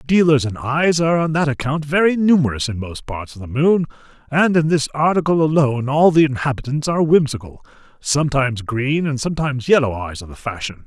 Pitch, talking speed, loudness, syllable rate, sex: 140 Hz, 190 wpm, -18 LUFS, 6.0 syllables/s, male